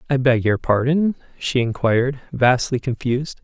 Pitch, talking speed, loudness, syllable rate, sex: 130 Hz, 140 wpm, -20 LUFS, 4.8 syllables/s, male